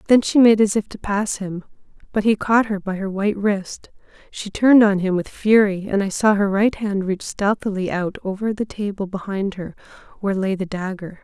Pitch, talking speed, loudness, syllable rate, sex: 200 Hz, 215 wpm, -20 LUFS, 5.2 syllables/s, female